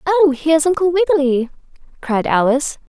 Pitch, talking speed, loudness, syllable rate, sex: 305 Hz, 120 wpm, -16 LUFS, 5.6 syllables/s, female